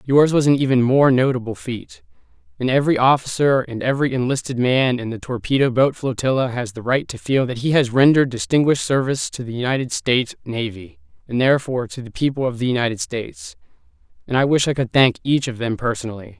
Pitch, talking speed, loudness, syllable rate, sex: 130 Hz, 200 wpm, -19 LUFS, 6.2 syllables/s, male